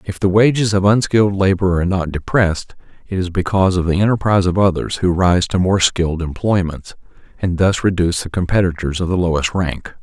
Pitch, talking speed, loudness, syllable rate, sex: 90 Hz, 190 wpm, -16 LUFS, 5.9 syllables/s, male